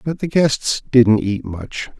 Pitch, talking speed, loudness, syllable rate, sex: 125 Hz, 180 wpm, -17 LUFS, 3.4 syllables/s, male